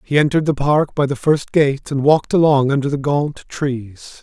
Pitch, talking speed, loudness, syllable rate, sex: 140 Hz, 215 wpm, -17 LUFS, 4.8 syllables/s, male